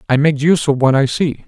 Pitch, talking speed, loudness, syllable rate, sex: 145 Hz, 285 wpm, -14 LUFS, 6.2 syllables/s, male